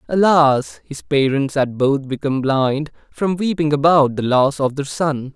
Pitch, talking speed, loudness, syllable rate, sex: 145 Hz, 170 wpm, -17 LUFS, 4.2 syllables/s, male